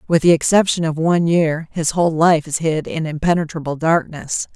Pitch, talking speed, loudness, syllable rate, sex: 160 Hz, 185 wpm, -17 LUFS, 5.4 syllables/s, female